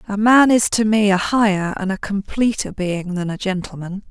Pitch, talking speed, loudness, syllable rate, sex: 200 Hz, 205 wpm, -18 LUFS, 4.9 syllables/s, female